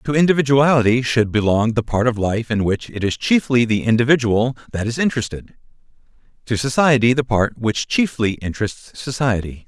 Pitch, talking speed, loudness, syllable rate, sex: 120 Hz, 160 wpm, -18 LUFS, 5.4 syllables/s, male